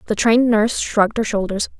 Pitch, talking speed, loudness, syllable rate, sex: 220 Hz, 200 wpm, -17 LUFS, 6.5 syllables/s, female